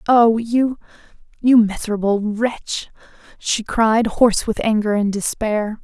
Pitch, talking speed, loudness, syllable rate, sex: 220 Hz, 115 wpm, -18 LUFS, 4.0 syllables/s, female